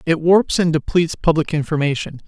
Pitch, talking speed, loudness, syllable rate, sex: 160 Hz, 160 wpm, -18 LUFS, 5.7 syllables/s, male